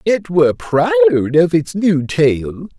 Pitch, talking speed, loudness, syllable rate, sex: 150 Hz, 150 wpm, -14 LUFS, 3.8 syllables/s, male